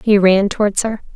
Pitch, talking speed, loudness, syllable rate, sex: 205 Hz, 210 wpm, -15 LUFS, 5.0 syllables/s, female